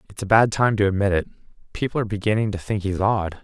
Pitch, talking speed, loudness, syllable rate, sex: 105 Hz, 225 wpm, -21 LUFS, 6.9 syllables/s, male